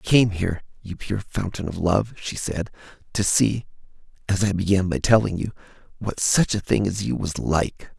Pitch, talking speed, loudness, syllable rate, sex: 95 Hz, 180 wpm, -23 LUFS, 4.9 syllables/s, male